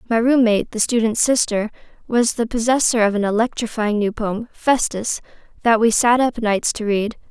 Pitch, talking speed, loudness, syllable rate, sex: 225 Hz, 165 wpm, -18 LUFS, 4.9 syllables/s, female